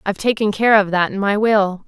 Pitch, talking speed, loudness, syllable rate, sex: 205 Hz, 255 wpm, -16 LUFS, 5.7 syllables/s, female